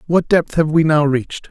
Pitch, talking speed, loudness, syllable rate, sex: 155 Hz, 240 wpm, -16 LUFS, 5.2 syllables/s, male